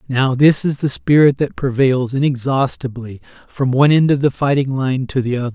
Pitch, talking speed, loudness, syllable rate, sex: 135 Hz, 195 wpm, -16 LUFS, 5.3 syllables/s, male